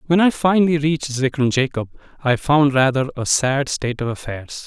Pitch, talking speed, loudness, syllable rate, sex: 140 Hz, 180 wpm, -19 LUFS, 5.4 syllables/s, male